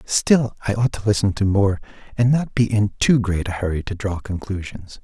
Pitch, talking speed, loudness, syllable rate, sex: 105 Hz, 215 wpm, -20 LUFS, 5.0 syllables/s, male